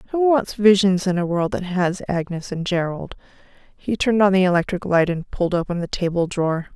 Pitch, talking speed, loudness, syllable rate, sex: 185 Hz, 205 wpm, -20 LUFS, 5.7 syllables/s, female